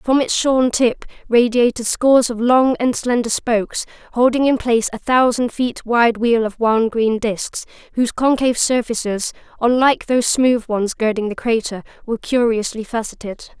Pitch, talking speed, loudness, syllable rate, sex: 235 Hz, 160 wpm, -17 LUFS, 4.9 syllables/s, female